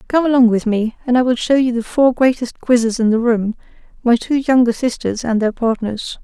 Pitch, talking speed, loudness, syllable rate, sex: 240 Hz, 220 wpm, -16 LUFS, 5.3 syllables/s, female